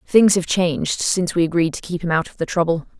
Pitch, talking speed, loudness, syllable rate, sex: 175 Hz, 260 wpm, -19 LUFS, 6.2 syllables/s, female